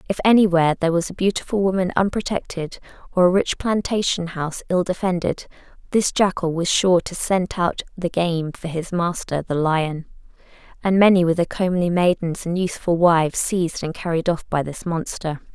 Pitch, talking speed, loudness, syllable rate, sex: 175 Hz, 175 wpm, -20 LUFS, 5.4 syllables/s, female